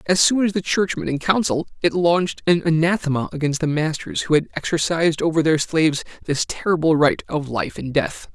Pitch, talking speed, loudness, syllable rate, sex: 160 Hz, 200 wpm, -20 LUFS, 5.5 syllables/s, male